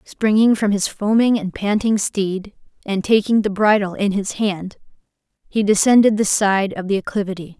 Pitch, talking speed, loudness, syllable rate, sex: 205 Hz, 165 wpm, -18 LUFS, 4.8 syllables/s, female